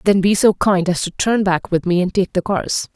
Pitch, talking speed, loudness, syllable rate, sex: 190 Hz, 285 wpm, -17 LUFS, 5.0 syllables/s, female